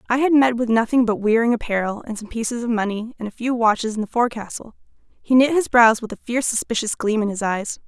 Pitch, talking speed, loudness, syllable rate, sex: 230 Hz, 245 wpm, -20 LUFS, 6.2 syllables/s, female